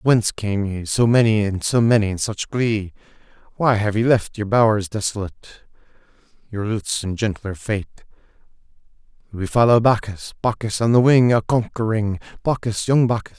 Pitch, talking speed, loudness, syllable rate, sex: 110 Hz, 155 wpm, -19 LUFS, 5.0 syllables/s, male